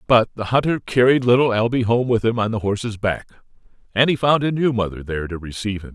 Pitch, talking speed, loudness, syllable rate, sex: 115 Hz, 230 wpm, -19 LUFS, 6.4 syllables/s, male